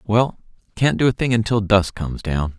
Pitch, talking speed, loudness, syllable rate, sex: 105 Hz, 210 wpm, -20 LUFS, 5.2 syllables/s, male